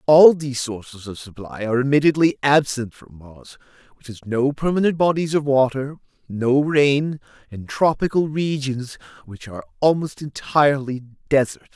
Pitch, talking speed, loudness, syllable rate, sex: 135 Hz, 140 wpm, -19 LUFS, 4.8 syllables/s, male